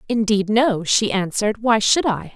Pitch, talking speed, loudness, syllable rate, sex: 215 Hz, 180 wpm, -18 LUFS, 4.6 syllables/s, female